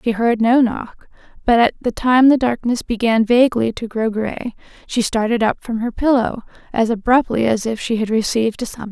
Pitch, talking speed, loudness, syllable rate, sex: 230 Hz, 200 wpm, -17 LUFS, 5.3 syllables/s, female